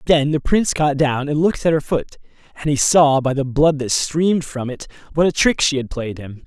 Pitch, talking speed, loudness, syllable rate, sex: 145 Hz, 250 wpm, -18 LUFS, 5.5 syllables/s, male